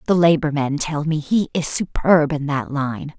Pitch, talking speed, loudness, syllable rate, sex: 150 Hz, 205 wpm, -19 LUFS, 4.4 syllables/s, female